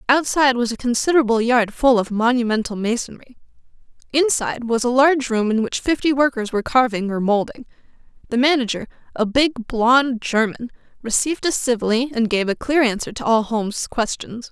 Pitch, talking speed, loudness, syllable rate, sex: 240 Hz, 165 wpm, -19 LUFS, 5.6 syllables/s, female